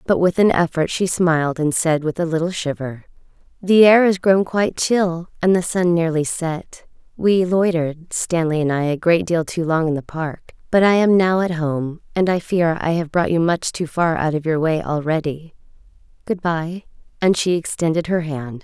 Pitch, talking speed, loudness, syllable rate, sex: 165 Hz, 205 wpm, -19 LUFS, 4.8 syllables/s, female